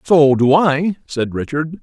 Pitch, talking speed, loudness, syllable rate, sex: 150 Hz, 165 wpm, -16 LUFS, 3.7 syllables/s, male